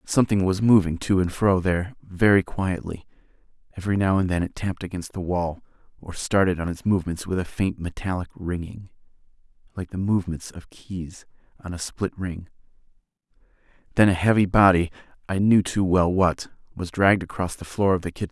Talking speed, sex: 180 wpm, male